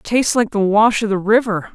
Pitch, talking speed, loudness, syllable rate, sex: 215 Hz, 240 wpm, -16 LUFS, 5.3 syllables/s, female